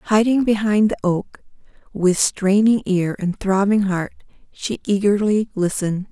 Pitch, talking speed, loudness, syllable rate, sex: 200 Hz, 130 wpm, -19 LUFS, 4.2 syllables/s, female